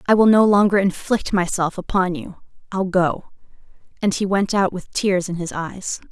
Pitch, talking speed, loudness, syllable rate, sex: 190 Hz, 185 wpm, -20 LUFS, 4.7 syllables/s, female